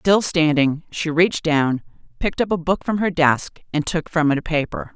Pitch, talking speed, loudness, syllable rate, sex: 160 Hz, 220 wpm, -20 LUFS, 5.0 syllables/s, female